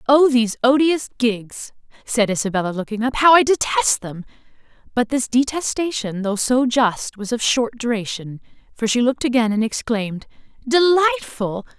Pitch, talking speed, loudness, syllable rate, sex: 245 Hz, 150 wpm, -19 LUFS, 4.9 syllables/s, female